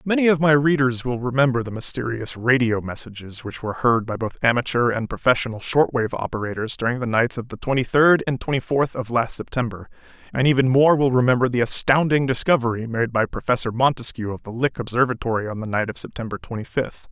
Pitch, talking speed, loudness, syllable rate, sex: 125 Hz, 200 wpm, -21 LUFS, 6.0 syllables/s, male